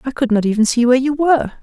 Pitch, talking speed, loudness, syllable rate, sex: 250 Hz, 295 wpm, -15 LUFS, 7.7 syllables/s, female